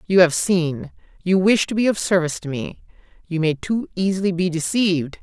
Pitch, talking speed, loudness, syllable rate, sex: 180 Hz, 185 wpm, -20 LUFS, 5.4 syllables/s, female